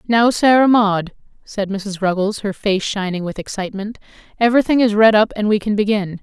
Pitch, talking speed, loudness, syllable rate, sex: 210 Hz, 185 wpm, -17 LUFS, 5.4 syllables/s, female